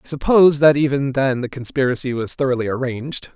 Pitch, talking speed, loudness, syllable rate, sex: 135 Hz, 180 wpm, -18 LUFS, 6.2 syllables/s, male